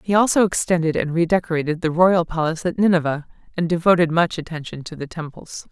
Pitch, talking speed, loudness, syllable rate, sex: 170 Hz, 180 wpm, -20 LUFS, 6.2 syllables/s, female